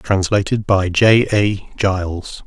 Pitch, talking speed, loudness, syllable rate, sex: 100 Hz, 120 wpm, -16 LUFS, 3.4 syllables/s, male